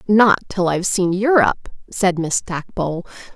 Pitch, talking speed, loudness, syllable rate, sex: 185 Hz, 145 wpm, -18 LUFS, 4.9 syllables/s, female